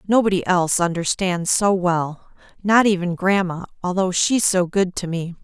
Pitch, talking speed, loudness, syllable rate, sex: 185 Hz, 155 wpm, -19 LUFS, 4.7 syllables/s, female